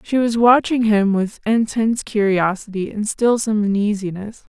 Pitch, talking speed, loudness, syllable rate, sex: 215 Hz, 145 wpm, -18 LUFS, 4.6 syllables/s, female